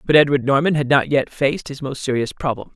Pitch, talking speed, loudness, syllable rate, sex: 135 Hz, 240 wpm, -19 LUFS, 6.1 syllables/s, male